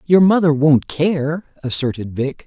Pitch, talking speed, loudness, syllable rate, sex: 150 Hz, 145 wpm, -17 LUFS, 4.1 syllables/s, male